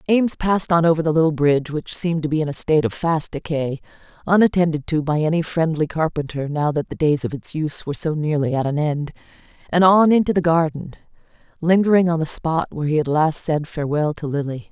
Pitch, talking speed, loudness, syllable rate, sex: 160 Hz, 215 wpm, -20 LUFS, 6.1 syllables/s, female